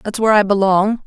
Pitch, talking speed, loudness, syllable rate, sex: 205 Hz, 225 wpm, -14 LUFS, 6.4 syllables/s, female